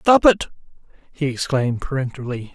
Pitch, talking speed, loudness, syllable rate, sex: 145 Hz, 120 wpm, -20 LUFS, 5.9 syllables/s, male